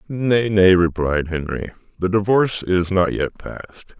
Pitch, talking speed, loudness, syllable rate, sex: 95 Hz, 150 wpm, -19 LUFS, 4.7 syllables/s, male